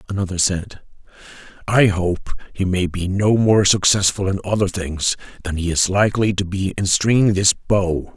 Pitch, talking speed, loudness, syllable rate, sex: 95 Hz, 170 wpm, -18 LUFS, 4.7 syllables/s, male